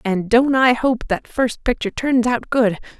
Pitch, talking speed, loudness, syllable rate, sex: 235 Hz, 200 wpm, -18 LUFS, 4.4 syllables/s, female